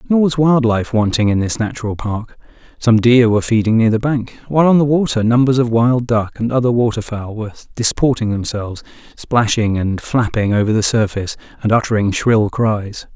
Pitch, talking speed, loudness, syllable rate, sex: 115 Hz, 185 wpm, -16 LUFS, 5.5 syllables/s, male